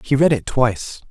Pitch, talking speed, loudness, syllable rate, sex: 125 Hz, 220 wpm, -18 LUFS, 5.4 syllables/s, male